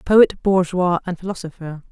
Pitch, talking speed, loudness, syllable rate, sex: 180 Hz, 125 wpm, -19 LUFS, 4.8 syllables/s, female